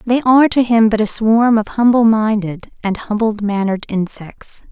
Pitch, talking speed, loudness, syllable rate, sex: 220 Hz, 180 wpm, -14 LUFS, 4.8 syllables/s, female